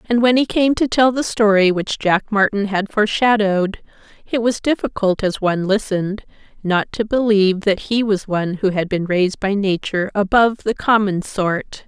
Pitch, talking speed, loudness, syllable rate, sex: 205 Hz, 180 wpm, -17 LUFS, 5.2 syllables/s, female